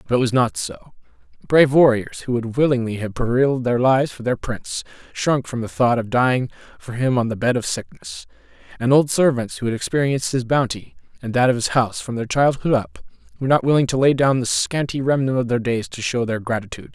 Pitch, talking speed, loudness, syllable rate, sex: 125 Hz, 225 wpm, -20 LUFS, 6.0 syllables/s, male